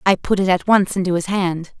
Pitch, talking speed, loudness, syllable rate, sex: 185 Hz, 265 wpm, -18 LUFS, 5.4 syllables/s, female